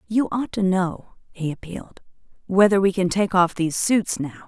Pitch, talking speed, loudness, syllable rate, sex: 190 Hz, 160 wpm, -21 LUFS, 5.4 syllables/s, female